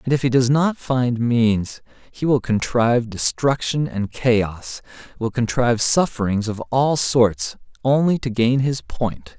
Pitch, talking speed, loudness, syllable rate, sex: 120 Hz, 155 wpm, -20 LUFS, 3.9 syllables/s, male